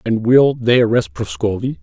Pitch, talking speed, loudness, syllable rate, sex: 110 Hz, 165 wpm, -15 LUFS, 4.7 syllables/s, male